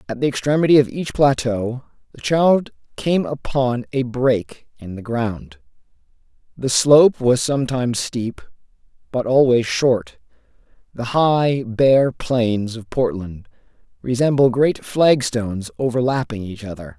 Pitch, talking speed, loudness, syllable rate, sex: 125 Hz, 125 wpm, -19 LUFS, 4.1 syllables/s, male